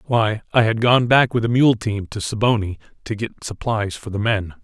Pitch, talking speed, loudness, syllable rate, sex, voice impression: 110 Hz, 220 wpm, -19 LUFS, 4.9 syllables/s, male, masculine, adult-like, thick, tensed, powerful, slightly hard, cool, intellectual, calm, mature, wild, lively, slightly strict